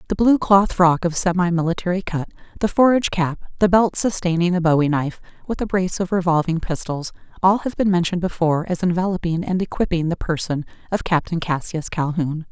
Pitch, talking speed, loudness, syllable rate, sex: 175 Hz, 170 wpm, -20 LUFS, 6.0 syllables/s, female